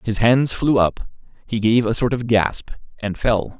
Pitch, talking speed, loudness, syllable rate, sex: 115 Hz, 200 wpm, -19 LUFS, 4.3 syllables/s, male